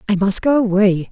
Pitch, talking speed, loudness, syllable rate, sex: 200 Hz, 215 wpm, -15 LUFS, 5.3 syllables/s, female